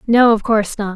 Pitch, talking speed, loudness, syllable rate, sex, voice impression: 220 Hz, 255 wpm, -15 LUFS, 5.8 syllables/s, female, feminine, slightly adult-like, slightly soft, cute, calm, friendly, slightly sweet, kind